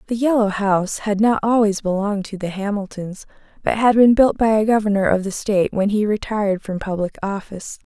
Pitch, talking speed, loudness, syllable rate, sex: 205 Hz, 195 wpm, -19 LUFS, 5.7 syllables/s, female